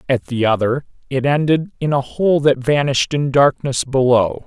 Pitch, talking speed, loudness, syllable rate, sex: 135 Hz, 175 wpm, -17 LUFS, 4.8 syllables/s, male